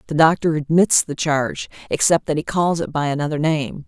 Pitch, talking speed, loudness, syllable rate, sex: 155 Hz, 200 wpm, -19 LUFS, 5.5 syllables/s, female